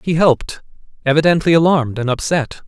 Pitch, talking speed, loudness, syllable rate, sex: 150 Hz, 135 wpm, -16 LUFS, 6.1 syllables/s, male